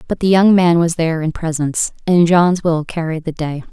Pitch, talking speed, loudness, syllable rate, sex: 165 Hz, 225 wpm, -15 LUFS, 5.3 syllables/s, female